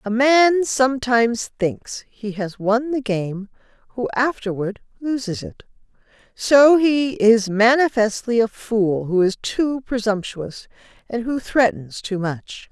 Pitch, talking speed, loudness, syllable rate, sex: 230 Hz, 130 wpm, -19 LUFS, 3.7 syllables/s, female